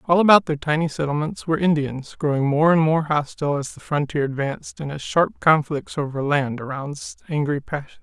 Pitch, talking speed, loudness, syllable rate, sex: 150 Hz, 185 wpm, -21 LUFS, 5.5 syllables/s, male